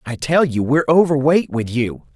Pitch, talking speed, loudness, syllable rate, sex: 140 Hz, 195 wpm, -17 LUFS, 5.2 syllables/s, male